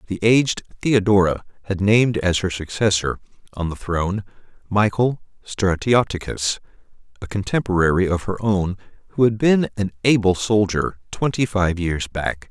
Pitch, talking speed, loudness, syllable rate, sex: 100 Hz, 135 wpm, -20 LUFS, 4.8 syllables/s, male